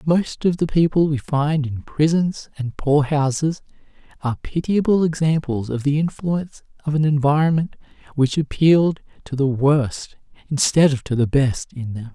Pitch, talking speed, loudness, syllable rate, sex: 145 Hz, 160 wpm, -20 LUFS, 4.7 syllables/s, male